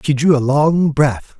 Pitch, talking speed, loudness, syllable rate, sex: 145 Hz, 215 wpm, -15 LUFS, 3.9 syllables/s, male